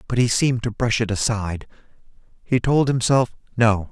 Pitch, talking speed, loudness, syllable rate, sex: 115 Hz, 170 wpm, -20 LUFS, 5.4 syllables/s, male